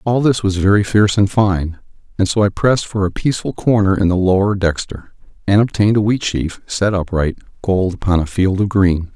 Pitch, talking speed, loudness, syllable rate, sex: 100 Hz, 210 wpm, -16 LUFS, 5.5 syllables/s, male